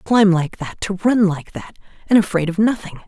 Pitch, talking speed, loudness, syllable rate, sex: 190 Hz, 235 wpm, -18 LUFS, 5.3 syllables/s, female